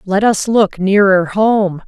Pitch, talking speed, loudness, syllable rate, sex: 200 Hz, 160 wpm, -13 LUFS, 3.5 syllables/s, female